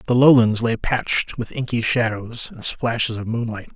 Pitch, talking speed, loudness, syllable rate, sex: 115 Hz, 175 wpm, -20 LUFS, 4.9 syllables/s, male